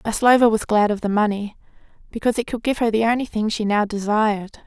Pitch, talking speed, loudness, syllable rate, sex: 220 Hz, 220 wpm, -20 LUFS, 6.5 syllables/s, female